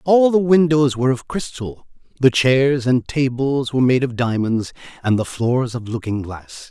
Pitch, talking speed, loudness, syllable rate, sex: 130 Hz, 180 wpm, -18 LUFS, 4.6 syllables/s, male